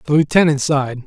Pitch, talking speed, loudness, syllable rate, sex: 145 Hz, 170 wpm, -16 LUFS, 7.0 syllables/s, male